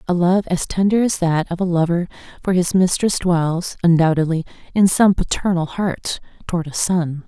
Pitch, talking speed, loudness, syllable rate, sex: 175 Hz, 175 wpm, -18 LUFS, 4.9 syllables/s, female